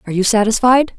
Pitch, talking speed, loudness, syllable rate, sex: 225 Hz, 185 wpm, -14 LUFS, 7.1 syllables/s, female